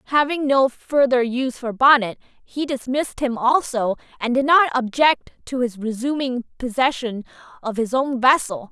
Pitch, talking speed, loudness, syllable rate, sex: 255 Hz, 150 wpm, -20 LUFS, 4.8 syllables/s, female